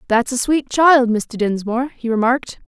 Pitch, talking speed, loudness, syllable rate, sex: 245 Hz, 180 wpm, -17 LUFS, 5.1 syllables/s, female